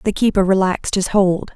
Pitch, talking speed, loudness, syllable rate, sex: 195 Hz, 195 wpm, -17 LUFS, 5.3 syllables/s, female